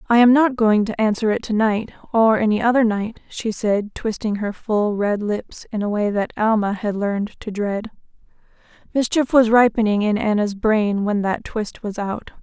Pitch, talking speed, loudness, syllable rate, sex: 215 Hz, 190 wpm, -20 LUFS, 4.7 syllables/s, female